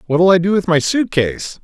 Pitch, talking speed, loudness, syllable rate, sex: 175 Hz, 260 wpm, -15 LUFS, 4.8 syllables/s, male